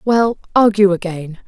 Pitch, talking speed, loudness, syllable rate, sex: 200 Hz, 120 wpm, -15 LUFS, 4.3 syllables/s, female